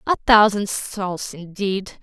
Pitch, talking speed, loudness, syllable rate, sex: 200 Hz, 120 wpm, -19 LUFS, 3.4 syllables/s, female